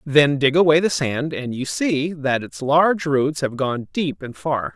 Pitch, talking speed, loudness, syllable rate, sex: 145 Hz, 215 wpm, -20 LUFS, 4.1 syllables/s, male